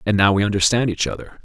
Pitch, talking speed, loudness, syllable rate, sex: 105 Hz, 250 wpm, -18 LUFS, 6.9 syllables/s, male